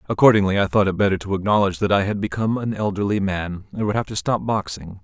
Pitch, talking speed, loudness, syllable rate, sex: 100 Hz, 240 wpm, -20 LUFS, 6.8 syllables/s, male